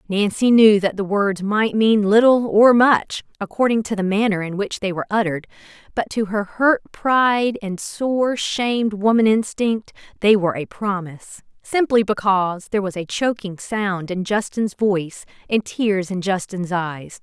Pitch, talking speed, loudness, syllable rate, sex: 205 Hz, 165 wpm, -19 LUFS, 4.6 syllables/s, female